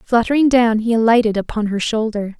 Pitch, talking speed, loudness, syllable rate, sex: 225 Hz, 175 wpm, -16 LUFS, 5.6 syllables/s, female